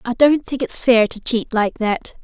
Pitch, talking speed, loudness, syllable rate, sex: 240 Hz, 240 wpm, -17 LUFS, 4.3 syllables/s, female